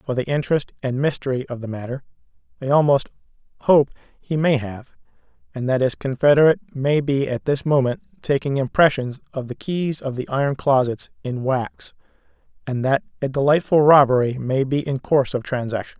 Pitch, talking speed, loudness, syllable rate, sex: 135 Hz, 170 wpm, -20 LUFS, 5.5 syllables/s, male